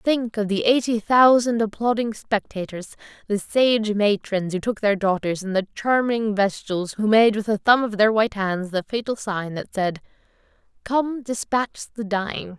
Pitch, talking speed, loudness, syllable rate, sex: 215 Hz, 170 wpm, -22 LUFS, 4.5 syllables/s, female